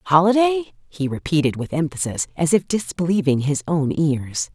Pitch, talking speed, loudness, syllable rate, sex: 165 Hz, 145 wpm, -20 LUFS, 4.9 syllables/s, female